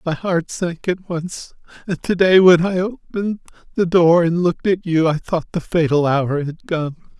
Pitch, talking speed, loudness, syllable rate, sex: 170 Hz, 200 wpm, -18 LUFS, 4.6 syllables/s, male